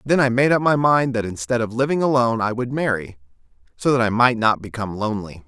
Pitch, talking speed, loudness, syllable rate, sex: 120 Hz, 230 wpm, -20 LUFS, 6.3 syllables/s, male